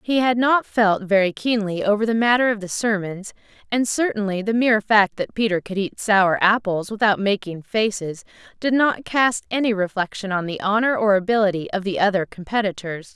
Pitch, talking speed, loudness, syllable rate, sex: 205 Hz, 180 wpm, -20 LUFS, 5.2 syllables/s, female